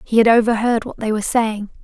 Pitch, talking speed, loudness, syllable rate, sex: 225 Hz, 230 wpm, -17 LUFS, 6.2 syllables/s, female